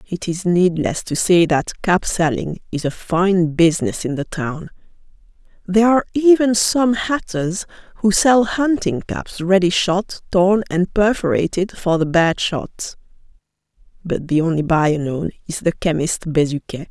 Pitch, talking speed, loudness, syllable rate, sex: 180 Hz, 150 wpm, -18 LUFS, 4.3 syllables/s, female